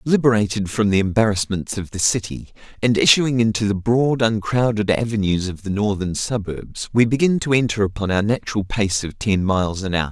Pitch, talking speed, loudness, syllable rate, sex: 105 Hz, 185 wpm, -19 LUFS, 5.4 syllables/s, male